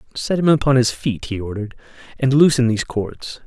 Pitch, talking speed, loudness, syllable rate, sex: 125 Hz, 190 wpm, -18 LUFS, 5.9 syllables/s, male